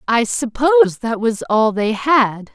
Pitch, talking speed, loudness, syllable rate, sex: 235 Hz, 165 wpm, -16 LUFS, 4.5 syllables/s, female